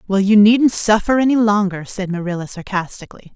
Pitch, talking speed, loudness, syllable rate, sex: 205 Hz, 160 wpm, -16 LUFS, 5.7 syllables/s, female